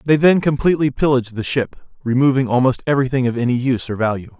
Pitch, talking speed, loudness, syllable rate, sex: 130 Hz, 190 wpm, -17 LUFS, 6.9 syllables/s, male